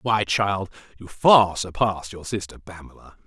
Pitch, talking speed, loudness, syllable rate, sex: 95 Hz, 145 wpm, -21 LUFS, 4.3 syllables/s, male